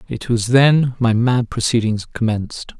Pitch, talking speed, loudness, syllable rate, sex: 120 Hz, 150 wpm, -17 LUFS, 4.3 syllables/s, male